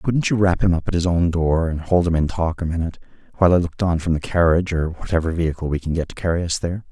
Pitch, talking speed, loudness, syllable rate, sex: 85 Hz, 285 wpm, -20 LUFS, 7.0 syllables/s, male